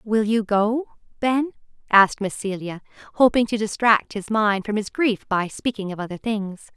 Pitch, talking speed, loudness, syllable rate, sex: 215 Hz, 180 wpm, -22 LUFS, 4.7 syllables/s, female